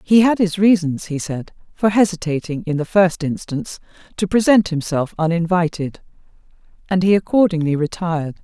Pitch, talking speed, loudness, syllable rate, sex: 175 Hz, 140 wpm, -18 LUFS, 5.4 syllables/s, female